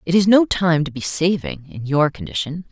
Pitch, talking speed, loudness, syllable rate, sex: 155 Hz, 220 wpm, -18 LUFS, 5.1 syllables/s, female